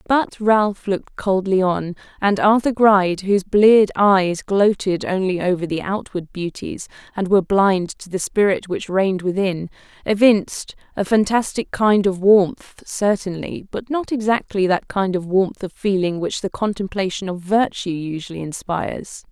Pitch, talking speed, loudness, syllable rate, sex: 195 Hz, 150 wpm, -19 LUFS, 4.6 syllables/s, female